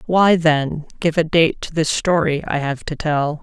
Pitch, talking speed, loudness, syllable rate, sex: 155 Hz, 210 wpm, -18 LUFS, 4.2 syllables/s, female